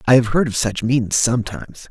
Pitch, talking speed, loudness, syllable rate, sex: 120 Hz, 220 wpm, -18 LUFS, 5.7 syllables/s, male